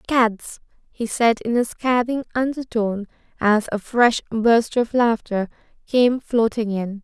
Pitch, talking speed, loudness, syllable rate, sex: 230 Hz, 135 wpm, -20 LUFS, 3.9 syllables/s, female